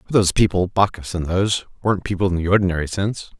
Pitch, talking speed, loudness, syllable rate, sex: 95 Hz, 210 wpm, -20 LUFS, 7.3 syllables/s, male